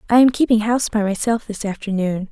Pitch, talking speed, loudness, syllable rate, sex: 215 Hz, 210 wpm, -19 LUFS, 6.2 syllables/s, female